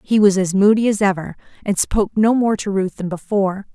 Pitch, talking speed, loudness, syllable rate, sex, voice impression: 200 Hz, 225 wpm, -17 LUFS, 5.8 syllables/s, female, very feminine, young, thin, tensed, very powerful, bright, slightly hard, clear, fluent, cute, intellectual, very refreshing, sincere, calm, friendly, reassuring, slightly unique, elegant, slightly wild, sweet, lively, strict, slightly intense, slightly sharp